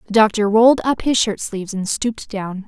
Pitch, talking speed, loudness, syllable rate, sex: 215 Hz, 225 wpm, -18 LUFS, 5.7 syllables/s, female